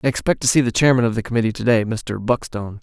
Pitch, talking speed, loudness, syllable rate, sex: 115 Hz, 275 wpm, -19 LUFS, 7.0 syllables/s, male